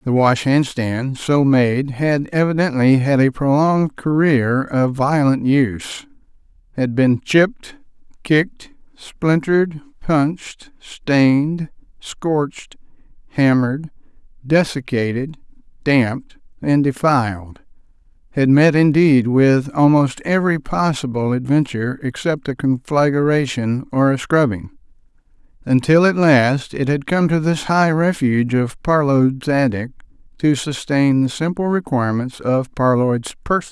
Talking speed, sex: 110 wpm, male